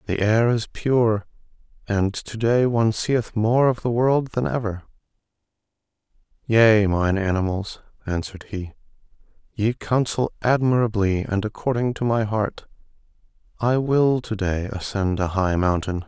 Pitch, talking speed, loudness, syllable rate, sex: 110 Hz, 130 wpm, -22 LUFS, 4.2 syllables/s, male